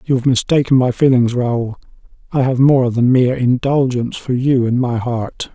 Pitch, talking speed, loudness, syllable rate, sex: 125 Hz, 185 wpm, -15 LUFS, 4.9 syllables/s, male